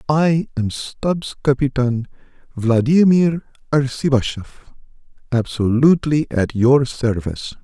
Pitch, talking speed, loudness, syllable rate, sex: 135 Hz, 70 wpm, -18 LUFS, 4.1 syllables/s, male